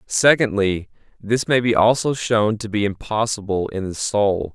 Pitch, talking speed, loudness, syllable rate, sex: 105 Hz, 160 wpm, -19 LUFS, 4.4 syllables/s, male